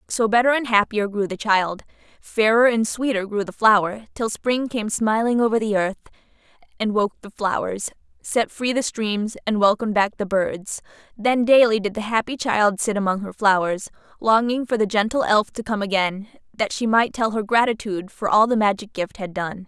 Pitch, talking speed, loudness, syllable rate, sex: 215 Hz, 195 wpm, -21 LUFS, 5.1 syllables/s, female